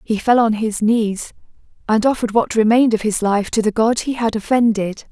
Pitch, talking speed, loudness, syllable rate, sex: 220 Hz, 210 wpm, -17 LUFS, 5.4 syllables/s, female